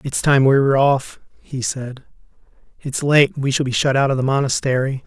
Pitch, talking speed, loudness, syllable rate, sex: 135 Hz, 200 wpm, -17 LUFS, 5.2 syllables/s, male